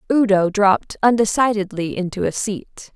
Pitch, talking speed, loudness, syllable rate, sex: 200 Hz, 120 wpm, -18 LUFS, 4.9 syllables/s, female